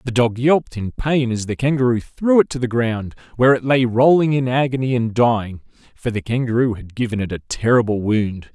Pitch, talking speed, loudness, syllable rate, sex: 120 Hz, 210 wpm, -18 LUFS, 5.5 syllables/s, male